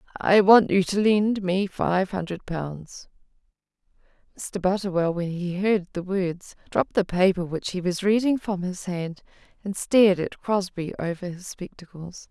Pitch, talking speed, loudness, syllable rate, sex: 185 Hz, 160 wpm, -24 LUFS, 4.4 syllables/s, female